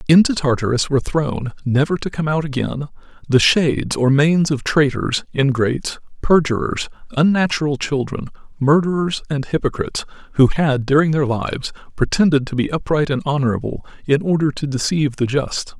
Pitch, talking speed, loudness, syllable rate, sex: 145 Hz, 150 wpm, -18 LUFS, 5.4 syllables/s, male